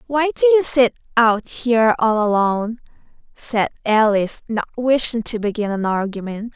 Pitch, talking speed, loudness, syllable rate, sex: 230 Hz, 145 wpm, -18 LUFS, 4.8 syllables/s, female